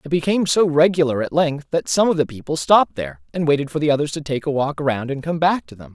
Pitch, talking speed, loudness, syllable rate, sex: 145 Hz, 280 wpm, -19 LUFS, 6.5 syllables/s, male